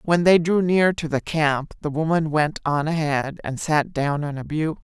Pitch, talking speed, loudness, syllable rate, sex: 155 Hz, 220 wpm, -22 LUFS, 4.6 syllables/s, female